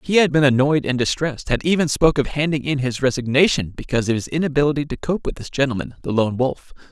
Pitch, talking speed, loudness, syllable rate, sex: 140 Hz, 225 wpm, -20 LUFS, 6.6 syllables/s, male